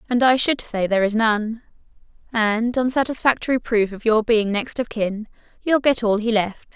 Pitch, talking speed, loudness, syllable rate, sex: 225 Hz, 195 wpm, -20 LUFS, 4.9 syllables/s, female